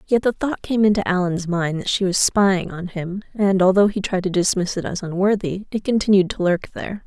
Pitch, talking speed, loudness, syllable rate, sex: 190 Hz, 230 wpm, -20 LUFS, 5.3 syllables/s, female